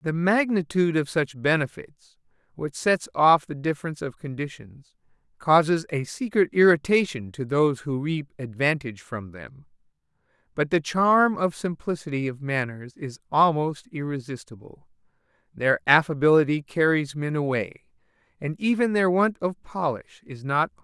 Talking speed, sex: 140 wpm, male